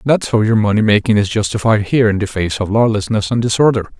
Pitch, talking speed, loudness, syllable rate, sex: 105 Hz, 225 wpm, -15 LUFS, 6.3 syllables/s, male